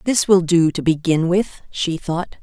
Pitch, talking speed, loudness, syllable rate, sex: 175 Hz, 200 wpm, -18 LUFS, 4.5 syllables/s, female